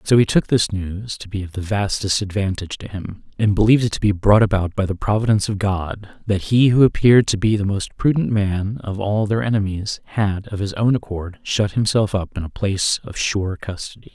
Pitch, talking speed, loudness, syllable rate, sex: 100 Hz, 225 wpm, -19 LUFS, 5.4 syllables/s, male